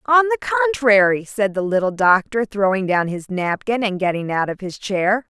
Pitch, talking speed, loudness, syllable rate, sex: 205 Hz, 190 wpm, -19 LUFS, 4.7 syllables/s, female